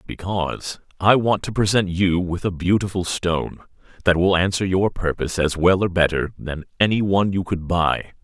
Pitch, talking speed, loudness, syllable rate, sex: 90 Hz, 180 wpm, -20 LUFS, 5.2 syllables/s, male